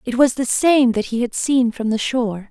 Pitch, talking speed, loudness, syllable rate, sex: 245 Hz, 265 wpm, -18 LUFS, 5.0 syllables/s, female